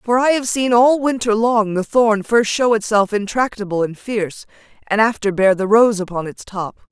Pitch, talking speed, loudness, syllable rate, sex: 220 Hz, 200 wpm, -17 LUFS, 4.9 syllables/s, female